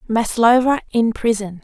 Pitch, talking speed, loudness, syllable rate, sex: 225 Hz, 110 wpm, -17 LUFS, 4.4 syllables/s, female